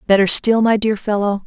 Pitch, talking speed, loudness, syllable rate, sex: 210 Hz, 205 wpm, -15 LUFS, 5.3 syllables/s, female